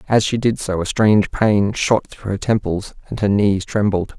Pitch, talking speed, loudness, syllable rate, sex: 105 Hz, 215 wpm, -18 LUFS, 4.7 syllables/s, male